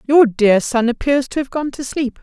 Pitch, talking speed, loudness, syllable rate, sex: 260 Hz, 240 wpm, -17 LUFS, 4.8 syllables/s, female